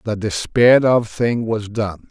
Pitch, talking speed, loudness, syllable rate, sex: 110 Hz, 170 wpm, -17 LUFS, 4.0 syllables/s, male